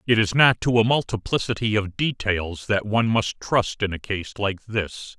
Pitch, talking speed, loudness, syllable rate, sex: 105 Hz, 195 wpm, -22 LUFS, 4.6 syllables/s, male